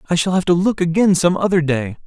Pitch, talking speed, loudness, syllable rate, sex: 175 Hz, 260 wpm, -16 LUFS, 6.2 syllables/s, male